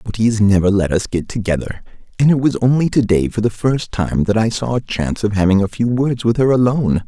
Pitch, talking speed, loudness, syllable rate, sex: 110 Hz, 255 wpm, -16 LUFS, 6.0 syllables/s, male